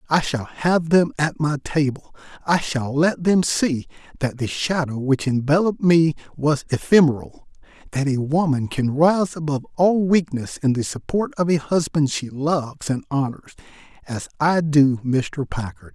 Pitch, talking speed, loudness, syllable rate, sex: 150 Hz, 160 wpm, -21 LUFS, 4.5 syllables/s, male